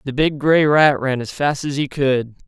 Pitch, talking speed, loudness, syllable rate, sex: 140 Hz, 245 wpm, -17 LUFS, 4.5 syllables/s, male